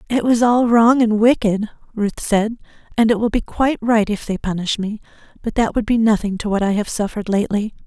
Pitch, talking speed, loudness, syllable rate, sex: 220 Hz, 220 wpm, -18 LUFS, 5.7 syllables/s, female